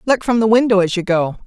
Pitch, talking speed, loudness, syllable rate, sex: 205 Hz, 285 wpm, -15 LUFS, 6.3 syllables/s, female